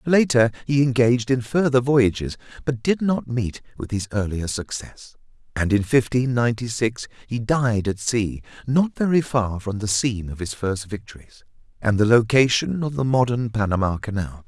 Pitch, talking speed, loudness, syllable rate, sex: 115 Hz, 170 wpm, -21 LUFS, 4.9 syllables/s, male